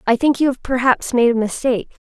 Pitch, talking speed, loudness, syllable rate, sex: 245 Hz, 230 wpm, -17 LUFS, 6.0 syllables/s, female